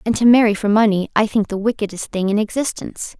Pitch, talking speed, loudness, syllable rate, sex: 215 Hz, 225 wpm, -17 LUFS, 6.3 syllables/s, female